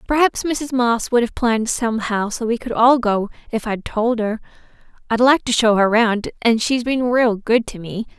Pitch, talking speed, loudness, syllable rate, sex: 230 Hz, 215 wpm, -18 LUFS, 4.7 syllables/s, female